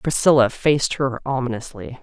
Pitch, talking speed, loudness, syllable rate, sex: 130 Hz, 120 wpm, -19 LUFS, 5.1 syllables/s, female